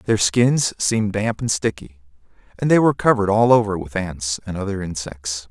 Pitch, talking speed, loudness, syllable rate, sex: 100 Hz, 185 wpm, -19 LUFS, 5.2 syllables/s, male